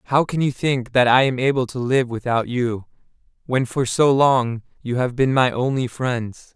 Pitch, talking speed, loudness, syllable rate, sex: 125 Hz, 200 wpm, -20 LUFS, 4.5 syllables/s, male